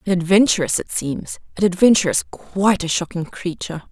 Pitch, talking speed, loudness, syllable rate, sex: 180 Hz, 155 wpm, -19 LUFS, 5.7 syllables/s, female